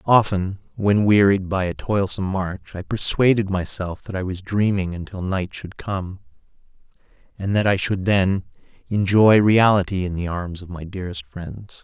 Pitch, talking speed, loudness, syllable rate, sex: 95 Hz, 160 wpm, -21 LUFS, 4.6 syllables/s, male